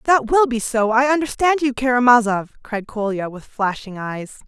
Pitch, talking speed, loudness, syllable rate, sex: 240 Hz, 175 wpm, -19 LUFS, 4.8 syllables/s, female